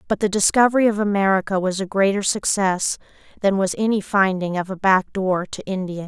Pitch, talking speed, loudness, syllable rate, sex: 195 Hz, 190 wpm, -20 LUFS, 5.6 syllables/s, female